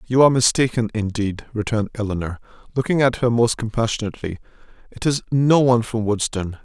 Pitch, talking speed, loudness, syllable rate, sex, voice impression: 115 Hz, 155 wpm, -20 LUFS, 6.2 syllables/s, male, very masculine, very adult-like, slightly old, very thick, tensed, very powerful, bright, slightly hard, clear, fluent, very cool, very intellectual, very sincere, very calm, very mature, very friendly, very reassuring, very unique, elegant, wild, sweet, slightly lively, strict, slightly intense, slightly modest